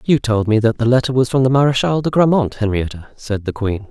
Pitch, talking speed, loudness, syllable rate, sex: 120 Hz, 245 wpm, -16 LUFS, 5.8 syllables/s, male